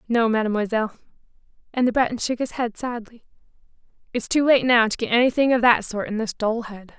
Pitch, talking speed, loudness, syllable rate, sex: 235 Hz, 200 wpm, -21 LUFS, 6.0 syllables/s, female